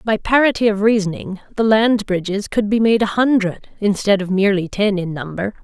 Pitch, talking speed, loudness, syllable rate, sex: 205 Hz, 190 wpm, -17 LUFS, 5.3 syllables/s, female